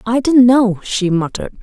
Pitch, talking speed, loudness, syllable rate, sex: 225 Hz, 150 wpm, -14 LUFS, 4.9 syllables/s, female